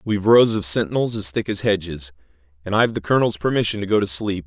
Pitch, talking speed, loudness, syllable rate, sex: 100 Hz, 230 wpm, -19 LUFS, 6.7 syllables/s, male